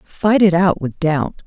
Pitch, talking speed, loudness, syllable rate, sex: 175 Hz, 205 wpm, -16 LUFS, 3.7 syllables/s, female